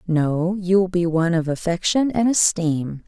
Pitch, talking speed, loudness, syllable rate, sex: 175 Hz, 175 wpm, -20 LUFS, 4.5 syllables/s, female